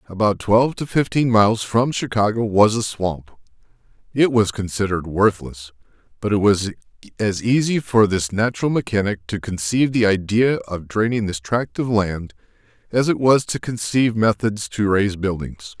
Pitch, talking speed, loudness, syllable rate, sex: 110 Hz, 160 wpm, -19 LUFS, 5.0 syllables/s, male